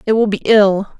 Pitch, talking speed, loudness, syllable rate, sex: 205 Hz, 240 wpm, -13 LUFS, 4.8 syllables/s, female